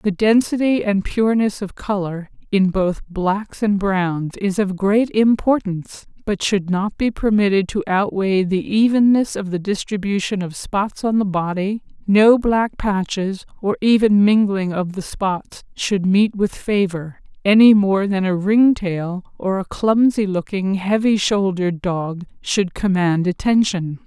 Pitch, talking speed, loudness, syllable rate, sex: 200 Hz, 150 wpm, -18 LUFS, 4.1 syllables/s, female